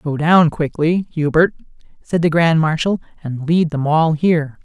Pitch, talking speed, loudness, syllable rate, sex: 160 Hz, 170 wpm, -16 LUFS, 4.4 syllables/s, female